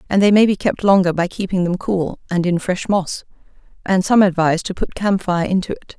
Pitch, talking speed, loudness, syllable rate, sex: 185 Hz, 220 wpm, -17 LUFS, 5.7 syllables/s, female